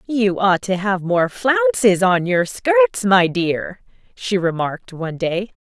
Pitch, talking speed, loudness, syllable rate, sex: 200 Hz, 160 wpm, -18 LUFS, 3.7 syllables/s, female